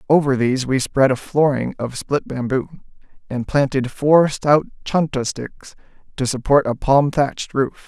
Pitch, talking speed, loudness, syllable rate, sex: 135 Hz, 160 wpm, -19 LUFS, 4.5 syllables/s, male